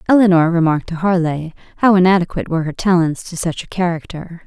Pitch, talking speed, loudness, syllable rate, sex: 175 Hz, 175 wpm, -16 LUFS, 6.5 syllables/s, female